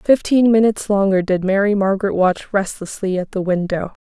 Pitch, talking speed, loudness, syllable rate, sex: 200 Hz, 165 wpm, -17 LUFS, 5.3 syllables/s, female